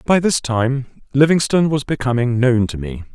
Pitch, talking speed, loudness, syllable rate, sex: 130 Hz, 170 wpm, -17 LUFS, 5.2 syllables/s, male